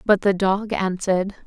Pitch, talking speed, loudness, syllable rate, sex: 195 Hz, 165 wpm, -21 LUFS, 4.8 syllables/s, female